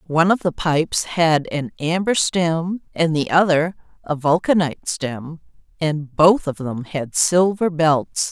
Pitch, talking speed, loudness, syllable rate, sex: 165 Hz, 150 wpm, -19 LUFS, 4.0 syllables/s, female